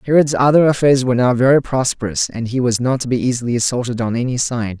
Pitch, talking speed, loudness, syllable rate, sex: 125 Hz, 225 wpm, -16 LUFS, 6.5 syllables/s, male